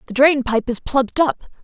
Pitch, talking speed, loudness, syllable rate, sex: 260 Hz, 220 wpm, -18 LUFS, 5.8 syllables/s, female